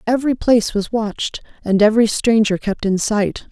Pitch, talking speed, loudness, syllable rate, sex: 215 Hz, 170 wpm, -17 LUFS, 5.4 syllables/s, female